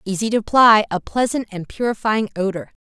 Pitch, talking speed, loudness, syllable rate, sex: 210 Hz, 170 wpm, -18 LUFS, 5.6 syllables/s, female